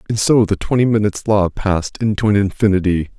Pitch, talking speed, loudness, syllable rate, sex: 100 Hz, 190 wpm, -16 LUFS, 6.2 syllables/s, male